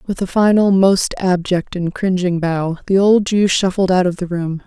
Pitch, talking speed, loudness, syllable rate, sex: 185 Hz, 205 wpm, -16 LUFS, 4.5 syllables/s, female